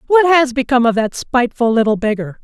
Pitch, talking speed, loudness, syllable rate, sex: 250 Hz, 195 wpm, -15 LUFS, 6.2 syllables/s, female